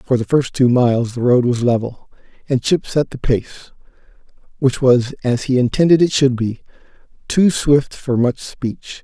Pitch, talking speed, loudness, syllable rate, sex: 130 Hz, 175 wpm, -16 LUFS, 4.6 syllables/s, male